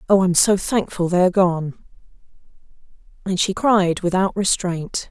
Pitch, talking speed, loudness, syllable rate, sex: 185 Hz, 155 wpm, -19 LUFS, 4.9 syllables/s, female